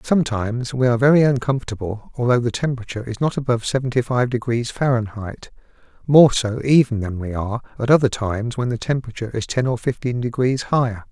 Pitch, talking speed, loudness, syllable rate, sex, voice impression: 120 Hz, 180 wpm, -20 LUFS, 6.4 syllables/s, male, masculine, adult-like, slightly middle-aged, slightly thick, slightly relaxed, slightly weak, slightly bright, very soft, slightly clear, fluent, slightly raspy, cool, very intellectual, slightly refreshing, sincere, very calm, slightly mature, friendly, very reassuring, elegant, slightly sweet, slightly lively, very kind, modest